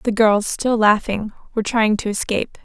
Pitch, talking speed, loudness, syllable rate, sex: 215 Hz, 180 wpm, -19 LUFS, 5.1 syllables/s, female